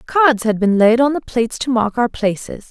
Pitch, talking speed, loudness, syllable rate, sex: 240 Hz, 245 wpm, -16 LUFS, 5.1 syllables/s, female